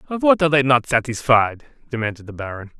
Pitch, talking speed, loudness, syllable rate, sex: 130 Hz, 195 wpm, -18 LUFS, 6.3 syllables/s, male